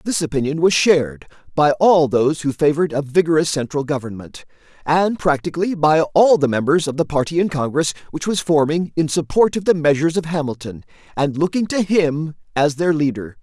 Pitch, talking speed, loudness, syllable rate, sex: 155 Hz, 185 wpm, -18 LUFS, 5.6 syllables/s, male